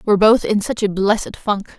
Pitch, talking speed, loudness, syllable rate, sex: 205 Hz, 235 wpm, -17 LUFS, 5.8 syllables/s, female